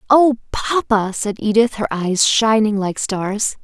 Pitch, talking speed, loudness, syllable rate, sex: 220 Hz, 150 wpm, -17 LUFS, 3.8 syllables/s, female